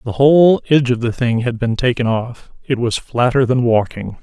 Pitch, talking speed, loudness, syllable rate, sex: 125 Hz, 200 wpm, -16 LUFS, 5.2 syllables/s, male